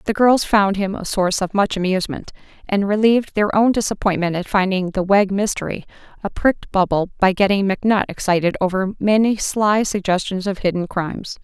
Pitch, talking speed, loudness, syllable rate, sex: 195 Hz, 175 wpm, -18 LUFS, 5.7 syllables/s, female